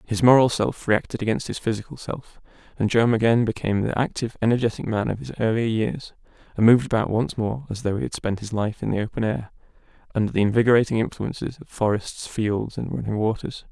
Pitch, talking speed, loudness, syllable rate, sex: 110 Hz, 200 wpm, -23 LUFS, 6.1 syllables/s, male